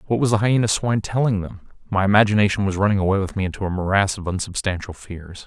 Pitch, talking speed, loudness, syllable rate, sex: 100 Hz, 220 wpm, -20 LUFS, 6.8 syllables/s, male